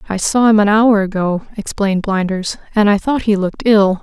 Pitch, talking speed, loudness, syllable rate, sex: 205 Hz, 210 wpm, -15 LUFS, 5.3 syllables/s, female